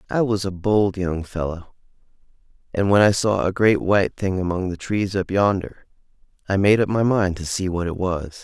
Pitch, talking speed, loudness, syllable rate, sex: 95 Hz, 205 wpm, -21 LUFS, 5.1 syllables/s, male